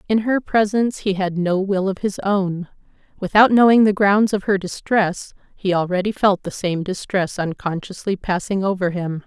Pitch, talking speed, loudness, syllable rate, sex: 195 Hz, 175 wpm, -19 LUFS, 4.8 syllables/s, female